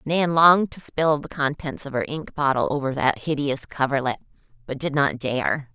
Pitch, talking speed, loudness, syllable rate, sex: 140 Hz, 190 wpm, -22 LUFS, 4.9 syllables/s, female